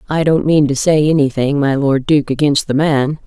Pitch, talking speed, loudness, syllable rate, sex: 145 Hz, 220 wpm, -14 LUFS, 5.0 syllables/s, female